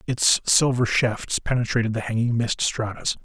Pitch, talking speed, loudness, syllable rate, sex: 115 Hz, 150 wpm, -22 LUFS, 4.7 syllables/s, male